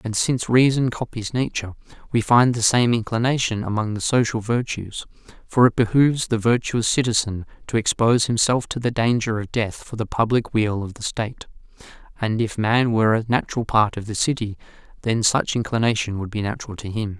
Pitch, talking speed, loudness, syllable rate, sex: 115 Hz, 185 wpm, -21 LUFS, 5.6 syllables/s, male